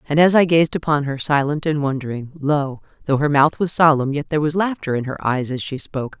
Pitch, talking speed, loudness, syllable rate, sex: 145 Hz, 240 wpm, -19 LUFS, 5.8 syllables/s, female